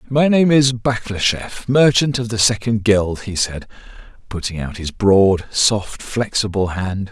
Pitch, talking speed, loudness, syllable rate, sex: 110 Hz, 150 wpm, -17 LUFS, 4.0 syllables/s, male